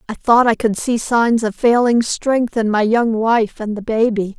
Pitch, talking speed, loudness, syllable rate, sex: 225 Hz, 220 wpm, -16 LUFS, 4.3 syllables/s, female